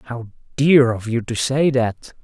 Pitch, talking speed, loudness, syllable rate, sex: 125 Hz, 190 wpm, -18 LUFS, 3.8 syllables/s, male